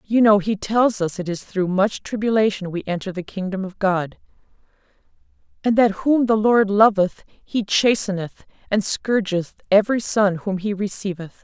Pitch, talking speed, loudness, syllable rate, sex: 200 Hz, 165 wpm, -20 LUFS, 4.7 syllables/s, female